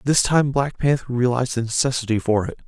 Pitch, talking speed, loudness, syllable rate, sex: 125 Hz, 200 wpm, -20 LUFS, 6.2 syllables/s, male